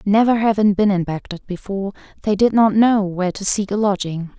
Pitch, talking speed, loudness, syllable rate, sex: 200 Hz, 205 wpm, -18 LUFS, 5.7 syllables/s, female